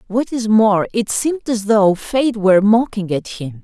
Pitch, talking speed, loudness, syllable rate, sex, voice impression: 215 Hz, 200 wpm, -16 LUFS, 4.4 syllables/s, female, slightly masculine, feminine, very gender-neutral, adult-like, middle-aged, slightly thin, tensed, powerful, very bright, hard, clear, fluent, slightly raspy, slightly cool, slightly intellectual, slightly mature, very unique, very wild, very lively, strict, intense, sharp